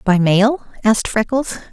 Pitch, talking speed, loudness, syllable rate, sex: 220 Hz, 140 wpm, -16 LUFS, 4.4 syllables/s, female